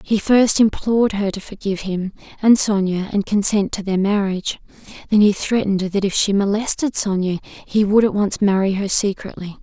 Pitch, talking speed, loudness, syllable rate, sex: 200 Hz, 180 wpm, -18 LUFS, 5.2 syllables/s, female